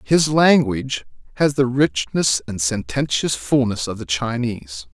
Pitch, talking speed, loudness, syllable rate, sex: 120 Hz, 130 wpm, -19 LUFS, 4.3 syllables/s, male